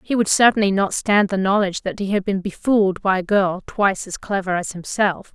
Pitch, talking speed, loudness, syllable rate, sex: 195 Hz, 225 wpm, -19 LUFS, 5.6 syllables/s, female